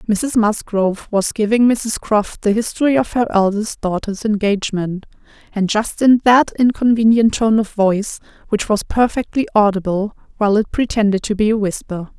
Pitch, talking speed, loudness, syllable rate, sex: 215 Hz, 160 wpm, -16 LUFS, 5.0 syllables/s, female